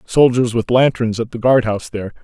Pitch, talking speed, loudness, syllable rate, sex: 115 Hz, 215 wpm, -16 LUFS, 5.9 syllables/s, male